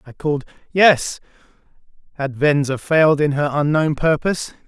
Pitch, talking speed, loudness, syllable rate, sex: 150 Hz, 130 wpm, -18 LUFS, 5.1 syllables/s, male